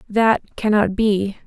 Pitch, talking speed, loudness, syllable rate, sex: 210 Hz, 125 wpm, -19 LUFS, 3.3 syllables/s, female